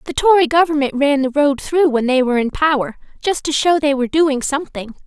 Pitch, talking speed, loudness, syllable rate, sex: 285 Hz, 225 wpm, -16 LUFS, 5.9 syllables/s, female